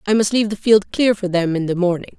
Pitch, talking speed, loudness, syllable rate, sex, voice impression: 200 Hz, 300 wpm, -17 LUFS, 6.3 syllables/s, female, feminine, adult-like, slightly cool, intellectual, slightly unique